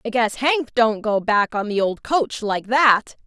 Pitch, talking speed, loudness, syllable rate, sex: 230 Hz, 220 wpm, -19 LUFS, 4.0 syllables/s, female